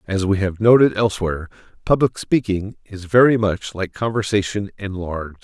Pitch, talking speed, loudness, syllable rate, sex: 100 Hz, 145 wpm, -19 LUFS, 5.2 syllables/s, male